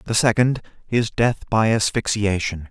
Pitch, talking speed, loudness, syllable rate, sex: 110 Hz, 135 wpm, -20 LUFS, 4.5 syllables/s, male